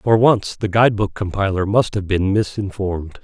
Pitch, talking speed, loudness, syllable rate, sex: 100 Hz, 185 wpm, -18 LUFS, 5.1 syllables/s, male